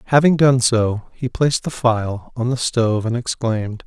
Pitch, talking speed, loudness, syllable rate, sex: 120 Hz, 185 wpm, -18 LUFS, 4.8 syllables/s, male